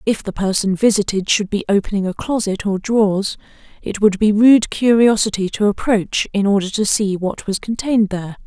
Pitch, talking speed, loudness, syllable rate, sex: 205 Hz, 185 wpm, -17 LUFS, 5.3 syllables/s, female